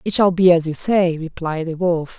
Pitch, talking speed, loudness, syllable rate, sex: 170 Hz, 245 wpm, -18 LUFS, 4.8 syllables/s, female